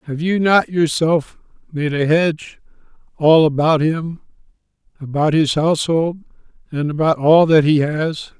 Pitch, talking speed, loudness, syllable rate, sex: 155 Hz, 135 wpm, -16 LUFS, 4.3 syllables/s, male